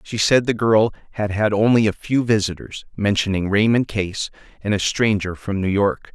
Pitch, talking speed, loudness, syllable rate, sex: 105 Hz, 185 wpm, -19 LUFS, 4.8 syllables/s, male